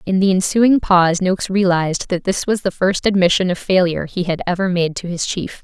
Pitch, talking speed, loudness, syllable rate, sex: 185 Hz, 225 wpm, -17 LUFS, 5.7 syllables/s, female